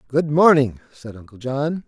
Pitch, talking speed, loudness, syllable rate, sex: 140 Hz, 160 wpm, -18 LUFS, 4.4 syllables/s, male